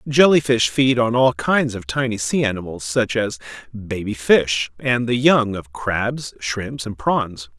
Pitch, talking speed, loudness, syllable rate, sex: 115 Hz, 175 wpm, -19 LUFS, 3.9 syllables/s, male